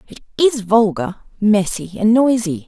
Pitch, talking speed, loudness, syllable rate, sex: 210 Hz, 135 wpm, -16 LUFS, 4.4 syllables/s, female